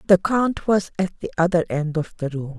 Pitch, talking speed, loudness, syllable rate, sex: 175 Hz, 230 wpm, -22 LUFS, 4.9 syllables/s, female